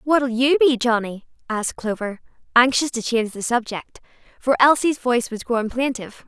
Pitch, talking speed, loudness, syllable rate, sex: 245 Hz, 165 wpm, -20 LUFS, 5.3 syllables/s, female